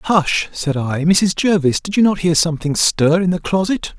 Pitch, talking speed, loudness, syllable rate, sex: 175 Hz, 210 wpm, -16 LUFS, 4.6 syllables/s, male